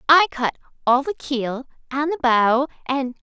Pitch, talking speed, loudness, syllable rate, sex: 270 Hz, 110 wpm, -21 LUFS, 4.4 syllables/s, female